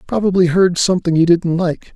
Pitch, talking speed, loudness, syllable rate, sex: 175 Hz, 185 wpm, -15 LUFS, 5.7 syllables/s, male